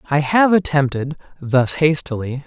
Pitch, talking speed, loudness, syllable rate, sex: 145 Hz, 120 wpm, -17 LUFS, 4.5 syllables/s, male